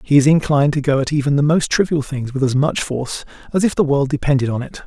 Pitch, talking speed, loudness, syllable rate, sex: 145 Hz, 270 wpm, -17 LUFS, 6.5 syllables/s, male